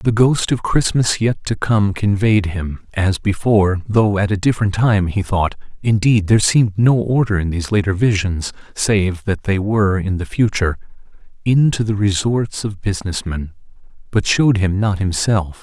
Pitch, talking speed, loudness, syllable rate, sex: 100 Hz, 165 wpm, -17 LUFS, 4.9 syllables/s, male